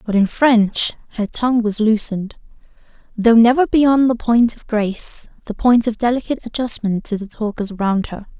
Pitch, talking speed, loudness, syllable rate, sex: 225 Hz, 170 wpm, -17 LUFS, 5.0 syllables/s, female